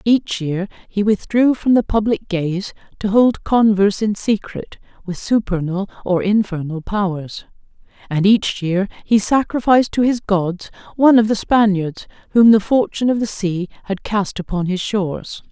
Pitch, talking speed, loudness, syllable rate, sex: 205 Hz, 160 wpm, -17 LUFS, 4.6 syllables/s, female